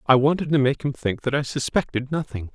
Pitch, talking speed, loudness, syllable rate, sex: 135 Hz, 235 wpm, -23 LUFS, 5.8 syllables/s, male